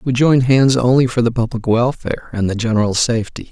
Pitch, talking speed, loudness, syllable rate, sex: 120 Hz, 205 wpm, -16 LUFS, 6.1 syllables/s, male